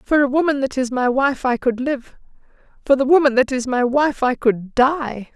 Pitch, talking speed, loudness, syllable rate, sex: 260 Hz, 225 wpm, -18 LUFS, 4.8 syllables/s, female